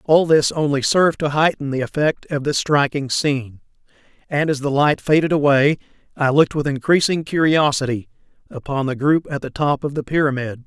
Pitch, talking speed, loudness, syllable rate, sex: 145 Hz, 180 wpm, -18 LUFS, 5.4 syllables/s, male